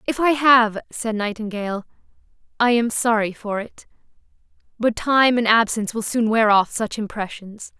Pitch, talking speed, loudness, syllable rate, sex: 225 Hz, 155 wpm, -20 LUFS, 4.8 syllables/s, female